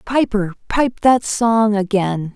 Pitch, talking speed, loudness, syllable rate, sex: 215 Hz, 130 wpm, -17 LUFS, 3.3 syllables/s, female